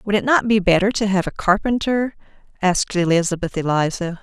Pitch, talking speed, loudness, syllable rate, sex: 195 Hz, 170 wpm, -19 LUFS, 5.7 syllables/s, female